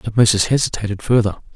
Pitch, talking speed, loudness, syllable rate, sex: 110 Hz, 115 wpm, -17 LUFS, 6.4 syllables/s, male